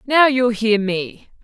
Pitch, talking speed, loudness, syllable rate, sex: 230 Hz, 165 wpm, -17 LUFS, 3.3 syllables/s, female